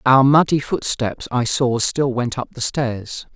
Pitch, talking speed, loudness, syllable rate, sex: 125 Hz, 180 wpm, -19 LUFS, 3.9 syllables/s, male